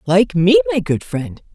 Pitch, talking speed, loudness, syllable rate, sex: 170 Hz, 195 wpm, -16 LUFS, 4.2 syllables/s, female